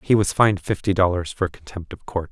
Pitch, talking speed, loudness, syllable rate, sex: 95 Hz, 235 wpm, -21 LUFS, 5.9 syllables/s, male